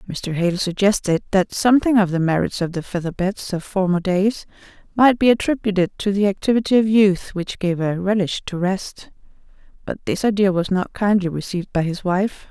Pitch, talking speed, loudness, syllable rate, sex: 190 Hz, 180 wpm, -19 LUFS, 5.2 syllables/s, female